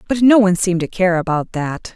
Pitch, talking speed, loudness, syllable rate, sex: 185 Hz, 245 wpm, -16 LUFS, 6.2 syllables/s, female